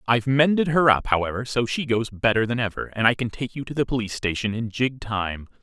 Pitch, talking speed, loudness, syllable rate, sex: 115 Hz, 245 wpm, -23 LUFS, 6.0 syllables/s, male